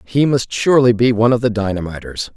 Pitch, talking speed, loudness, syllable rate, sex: 115 Hz, 205 wpm, -16 LUFS, 6.2 syllables/s, male